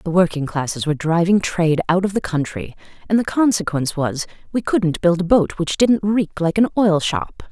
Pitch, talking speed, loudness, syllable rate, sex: 175 Hz, 210 wpm, -19 LUFS, 5.3 syllables/s, female